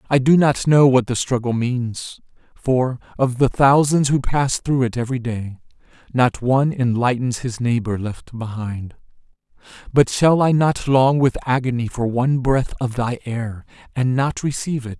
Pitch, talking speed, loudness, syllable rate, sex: 125 Hz, 170 wpm, -19 LUFS, 4.6 syllables/s, male